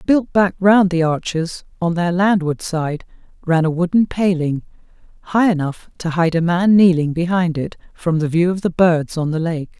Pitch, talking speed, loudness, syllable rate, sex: 170 Hz, 190 wpm, -17 LUFS, 4.7 syllables/s, female